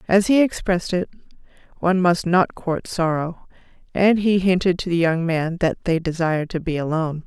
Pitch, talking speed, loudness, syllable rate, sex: 175 Hz, 180 wpm, -20 LUFS, 5.3 syllables/s, female